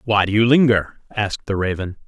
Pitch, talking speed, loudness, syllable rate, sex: 105 Hz, 200 wpm, -18 LUFS, 5.6 syllables/s, male